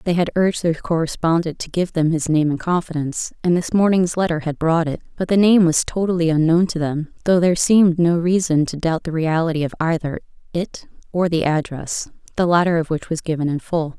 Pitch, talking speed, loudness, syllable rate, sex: 165 Hz, 215 wpm, -19 LUFS, 5.7 syllables/s, female